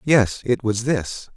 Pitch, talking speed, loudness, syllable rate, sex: 120 Hz, 175 wpm, -21 LUFS, 3.4 syllables/s, male